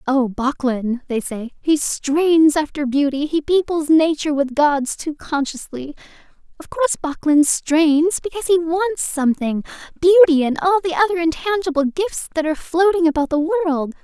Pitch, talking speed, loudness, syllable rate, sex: 310 Hz, 150 wpm, -18 LUFS, 5.2 syllables/s, female